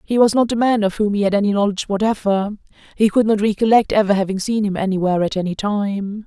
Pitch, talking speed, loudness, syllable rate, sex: 205 Hz, 220 wpm, -18 LUFS, 6.4 syllables/s, female